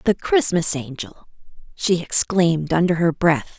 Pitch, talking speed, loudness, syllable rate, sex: 170 Hz, 135 wpm, -19 LUFS, 4.5 syllables/s, female